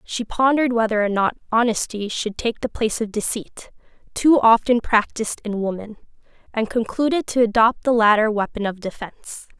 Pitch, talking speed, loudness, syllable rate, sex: 225 Hz, 150 wpm, -20 LUFS, 5.4 syllables/s, female